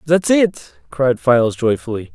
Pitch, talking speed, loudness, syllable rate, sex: 130 Hz, 140 wpm, -16 LUFS, 4.2 syllables/s, male